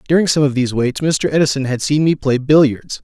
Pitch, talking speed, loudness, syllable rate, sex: 140 Hz, 235 wpm, -15 LUFS, 6.0 syllables/s, male